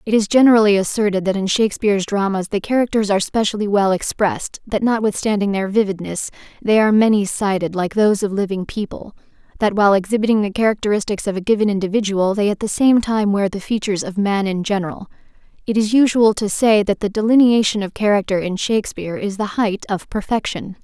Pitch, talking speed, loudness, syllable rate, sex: 205 Hz, 185 wpm, -18 LUFS, 6.2 syllables/s, female